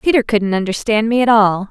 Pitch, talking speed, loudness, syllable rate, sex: 220 Hz, 210 wpm, -15 LUFS, 5.6 syllables/s, female